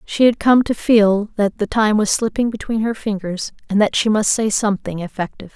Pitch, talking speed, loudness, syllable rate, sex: 210 Hz, 215 wpm, -18 LUFS, 5.4 syllables/s, female